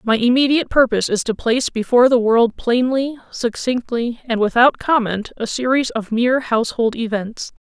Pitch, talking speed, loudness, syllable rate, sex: 240 Hz, 155 wpm, -17 LUFS, 5.3 syllables/s, female